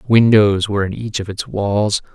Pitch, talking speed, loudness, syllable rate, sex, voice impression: 105 Hz, 195 wpm, -16 LUFS, 4.5 syllables/s, male, masculine, middle-aged, slightly thick, cool, sincere, calm